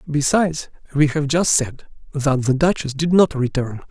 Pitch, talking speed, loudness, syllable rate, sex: 145 Hz, 170 wpm, -19 LUFS, 4.8 syllables/s, male